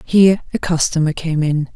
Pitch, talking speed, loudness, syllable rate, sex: 165 Hz, 170 wpm, -16 LUFS, 5.2 syllables/s, female